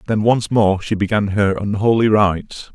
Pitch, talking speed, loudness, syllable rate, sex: 105 Hz, 175 wpm, -17 LUFS, 4.7 syllables/s, male